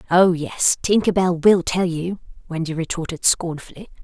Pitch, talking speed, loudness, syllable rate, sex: 175 Hz, 150 wpm, -19 LUFS, 4.7 syllables/s, female